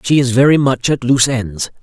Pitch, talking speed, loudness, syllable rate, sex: 125 Hz, 230 wpm, -14 LUFS, 5.5 syllables/s, male